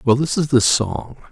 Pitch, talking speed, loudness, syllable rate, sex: 130 Hz, 230 wpm, -17 LUFS, 4.6 syllables/s, male